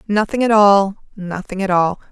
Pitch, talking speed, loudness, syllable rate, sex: 200 Hz, 140 wpm, -15 LUFS, 4.8 syllables/s, female